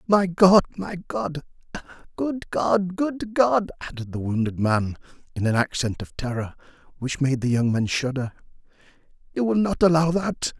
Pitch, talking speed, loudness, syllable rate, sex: 155 Hz, 160 wpm, -23 LUFS, 4.6 syllables/s, male